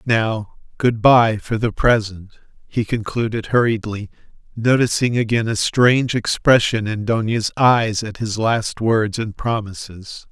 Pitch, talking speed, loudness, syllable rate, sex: 110 Hz, 135 wpm, -18 LUFS, 4.0 syllables/s, male